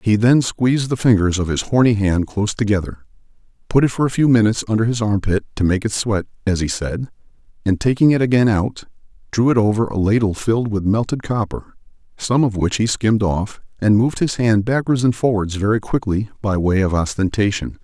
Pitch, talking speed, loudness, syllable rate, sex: 110 Hz, 200 wpm, -18 LUFS, 5.7 syllables/s, male